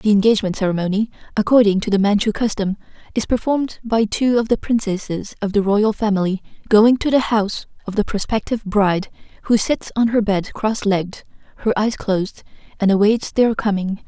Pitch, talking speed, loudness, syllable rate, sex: 210 Hz, 175 wpm, -18 LUFS, 5.7 syllables/s, female